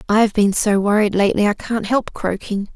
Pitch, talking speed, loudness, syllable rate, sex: 205 Hz, 195 wpm, -18 LUFS, 5.5 syllables/s, female